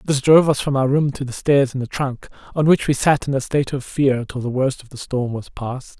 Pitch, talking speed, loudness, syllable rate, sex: 135 Hz, 290 wpm, -19 LUFS, 5.5 syllables/s, male